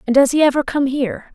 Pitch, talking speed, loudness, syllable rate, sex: 270 Hz, 270 wpm, -17 LUFS, 7.0 syllables/s, female